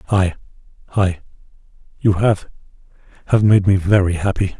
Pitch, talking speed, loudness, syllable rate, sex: 95 Hz, 80 wpm, -17 LUFS, 5.2 syllables/s, male